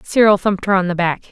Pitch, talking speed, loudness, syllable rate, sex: 190 Hz, 275 wpm, -16 LUFS, 7.0 syllables/s, female